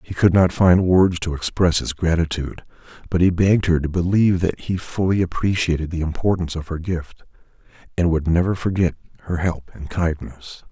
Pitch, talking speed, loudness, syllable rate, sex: 85 Hz, 180 wpm, -20 LUFS, 5.5 syllables/s, male